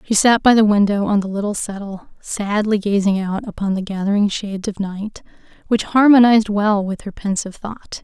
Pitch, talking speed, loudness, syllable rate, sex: 205 Hz, 185 wpm, -17 LUFS, 5.4 syllables/s, female